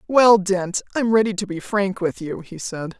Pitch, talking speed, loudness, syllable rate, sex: 195 Hz, 220 wpm, -20 LUFS, 4.4 syllables/s, female